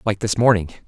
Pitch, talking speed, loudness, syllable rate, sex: 105 Hz, 205 wpm, -18 LUFS, 6.1 syllables/s, male